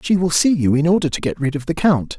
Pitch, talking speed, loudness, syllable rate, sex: 155 Hz, 330 wpm, -17 LUFS, 6.2 syllables/s, male